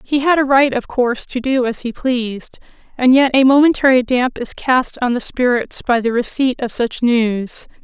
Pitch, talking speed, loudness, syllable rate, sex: 250 Hz, 205 wpm, -16 LUFS, 4.8 syllables/s, female